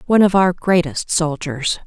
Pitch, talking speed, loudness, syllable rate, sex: 170 Hz, 160 wpm, -17 LUFS, 4.8 syllables/s, female